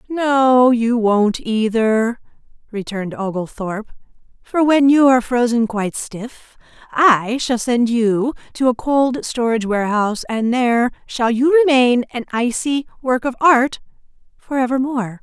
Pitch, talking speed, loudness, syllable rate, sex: 240 Hz, 135 wpm, -17 LUFS, 4.2 syllables/s, female